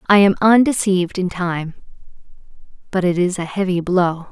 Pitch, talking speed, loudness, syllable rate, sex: 185 Hz, 155 wpm, -17 LUFS, 5.2 syllables/s, female